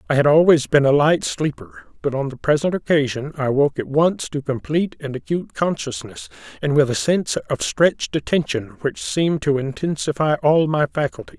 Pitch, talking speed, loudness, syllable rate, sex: 150 Hz, 185 wpm, -20 LUFS, 5.4 syllables/s, male